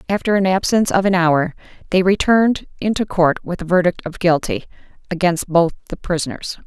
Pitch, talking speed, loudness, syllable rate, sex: 180 Hz, 170 wpm, -18 LUFS, 5.7 syllables/s, female